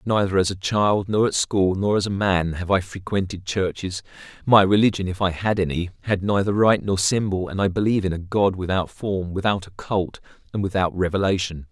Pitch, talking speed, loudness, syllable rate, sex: 95 Hz, 205 wpm, -22 LUFS, 5.3 syllables/s, male